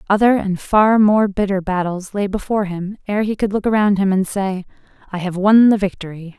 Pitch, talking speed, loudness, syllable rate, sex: 195 Hz, 205 wpm, -17 LUFS, 5.3 syllables/s, female